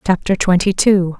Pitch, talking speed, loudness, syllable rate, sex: 185 Hz, 150 wpm, -15 LUFS, 4.8 syllables/s, female